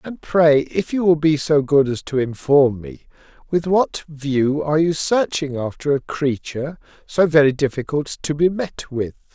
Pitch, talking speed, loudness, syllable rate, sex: 150 Hz, 180 wpm, -19 LUFS, 4.5 syllables/s, male